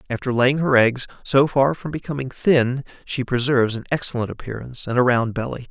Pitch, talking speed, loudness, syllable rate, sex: 130 Hz, 190 wpm, -21 LUFS, 5.7 syllables/s, male